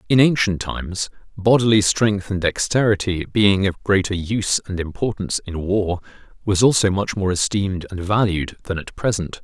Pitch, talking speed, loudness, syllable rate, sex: 100 Hz, 160 wpm, -20 LUFS, 5.1 syllables/s, male